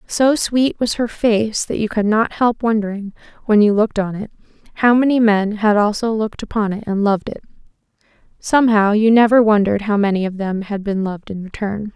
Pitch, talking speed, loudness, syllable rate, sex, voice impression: 215 Hz, 200 wpm, -17 LUFS, 5.6 syllables/s, female, feminine, adult-like, relaxed, slightly weak, soft, fluent, slightly raspy, slightly cute, friendly, reassuring, elegant, kind, modest